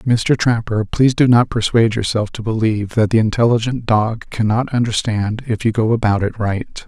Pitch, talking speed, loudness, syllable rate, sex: 110 Hz, 185 wpm, -17 LUFS, 5.2 syllables/s, male